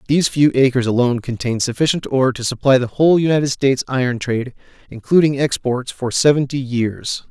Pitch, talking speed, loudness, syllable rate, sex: 130 Hz, 165 wpm, -17 LUFS, 6.2 syllables/s, male